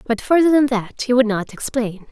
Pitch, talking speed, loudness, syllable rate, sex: 240 Hz, 225 wpm, -18 LUFS, 5.1 syllables/s, female